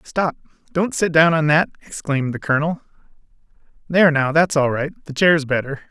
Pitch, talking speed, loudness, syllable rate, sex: 150 Hz, 165 wpm, -18 LUFS, 5.5 syllables/s, male